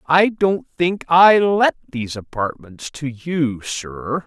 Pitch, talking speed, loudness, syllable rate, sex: 155 Hz, 140 wpm, -18 LUFS, 3.2 syllables/s, male